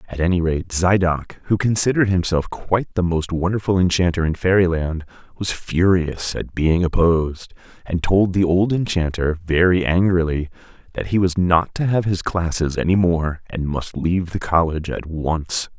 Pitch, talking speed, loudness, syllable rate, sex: 85 Hz, 165 wpm, -19 LUFS, 4.9 syllables/s, male